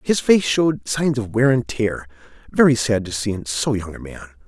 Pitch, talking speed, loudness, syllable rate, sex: 110 Hz, 230 wpm, -19 LUFS, 5.2 syllables/s, male